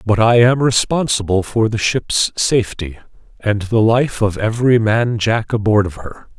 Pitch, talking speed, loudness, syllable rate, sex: 110 Hz, 170 wpm, -16 LUFS, 4.5 syllables/s, male